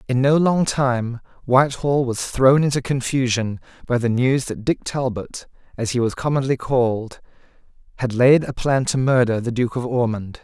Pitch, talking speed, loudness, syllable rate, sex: 125 Hz, 170 wpm, -20 LUFS, 4.7 syllables/s, male